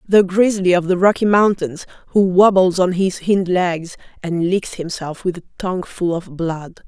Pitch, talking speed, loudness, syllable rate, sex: 180 Hz, 185 wpm, -17 LUFS, 4.5 syllables/s, female